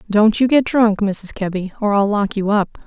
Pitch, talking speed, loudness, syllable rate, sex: 210 Hz, 230 wpm, -17 LUFS, 4.8 syllables/s, female